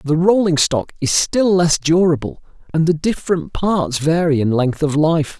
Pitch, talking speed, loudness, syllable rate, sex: 160 Hz, 180 wpm, -16 LUFS, 4.5 syllables/s, male